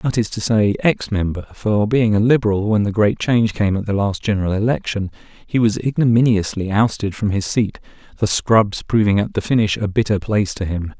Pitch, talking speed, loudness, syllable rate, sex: 105 Hz, 205 wpm, -18 LUFS, 5.5 syllables/s, male